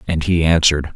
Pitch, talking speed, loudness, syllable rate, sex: 80 Hz, 190 wpm, -15 LUFS, 6.2 syllables/s, male